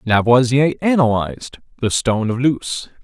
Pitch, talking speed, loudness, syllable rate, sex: 125 Hz, 120 wpm, -17 LUFS, 4.7 syllables/s, male